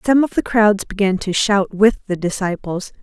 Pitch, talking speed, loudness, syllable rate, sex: 205 Hz, 200 wpm, -17 LUFS, 4.7 syllables/s, female